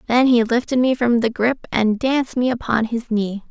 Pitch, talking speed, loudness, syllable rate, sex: 240 Hz, 225 wpm, -19 LUFS, 5.0 syllables/s, female